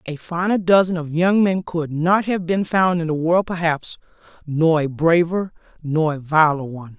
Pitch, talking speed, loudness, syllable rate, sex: 165 Hz, 190 wpm, -19 LUFS, 4.6 syllables/s, female